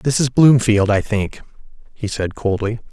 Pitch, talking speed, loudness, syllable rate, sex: 110 Hz, 165 wpm, -17 LUFS, 4.4 syllables/s, male